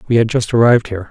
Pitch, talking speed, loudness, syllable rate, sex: 115 Hz, 270 wpm, -14 LUFS, 8.6 syllables/s, male